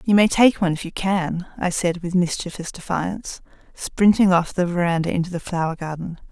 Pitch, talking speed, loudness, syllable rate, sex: 175 Hz, 190 wpm, -21 LUFS, 5.4 syllables/s, female